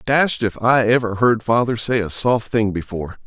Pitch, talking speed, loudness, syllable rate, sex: 115 Hz, 200 wpm, -18 LUFS, 4.9 syllables/s, male